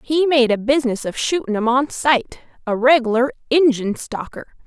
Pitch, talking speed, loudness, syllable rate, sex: 255 Hz, 155 wpm, -18 LUFS, 4.7 syllables/s, female